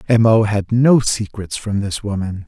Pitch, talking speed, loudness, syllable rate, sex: 105 Hz, 195 wpm, -17 LUFS, 4.4 syllables/s, male